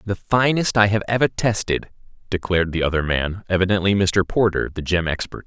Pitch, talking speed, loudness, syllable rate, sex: 95 Hz, 175 wpm, -20 LUFS, 5.6 syllables/s, male